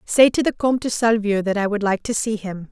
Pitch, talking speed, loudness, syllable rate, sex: 215 Hz, 290 wpm, -20 LUFS, 5.8 syllables/s, female